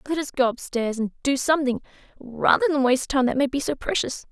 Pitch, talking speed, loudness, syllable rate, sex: 265 Hz, 235 wpm, -23 LUFS, 5.9 syllables/s, female